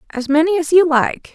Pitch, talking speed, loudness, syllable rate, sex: 315 Hz, 225 wpm, -15 LUFS, 5.6 syllables/s, female